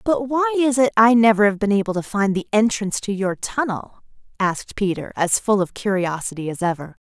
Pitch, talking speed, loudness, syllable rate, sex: 210 Hz, 205 wpm, -20 LUFS, 5.5 syllables/s, female